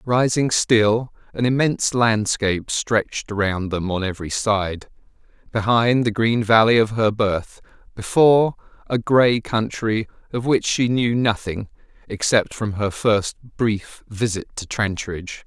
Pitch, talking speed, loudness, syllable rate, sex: 110 Hz, 135 wpm, -20 LUFS, 4.2 syllables/s, male